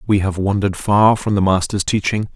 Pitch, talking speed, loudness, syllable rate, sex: 100 Hz, 205 wpm, -17 LUFS, 5.6 syllables/s, male